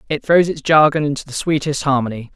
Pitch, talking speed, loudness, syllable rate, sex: 145 Hz, 205 wpm, -16 LUFS, 6.1 syllables/s, male